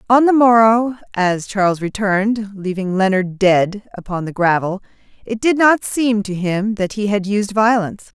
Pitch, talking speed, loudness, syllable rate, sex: 205 Hz, 170 wpm, -16 LUFS, 4.6 syllables/s, female